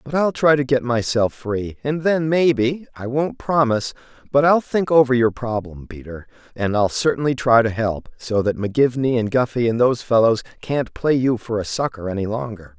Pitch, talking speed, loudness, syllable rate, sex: 125 Hz, 190 wpm, -19 LUFS, 5.2 syllables/s, male